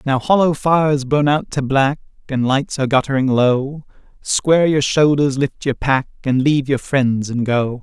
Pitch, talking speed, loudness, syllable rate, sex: 135 Hz, 185 wpm, -17 LUFS, 4.6 syllables/s, male